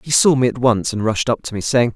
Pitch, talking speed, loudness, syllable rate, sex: 120 Hz, 340 wpm, -17 LUFS, 6.0 syllables/s, male